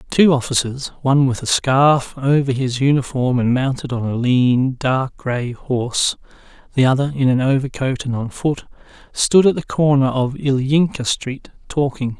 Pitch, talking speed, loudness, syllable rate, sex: 130 Hz, 160 wpm, -18 LUFS, 4.6 syllables/s, male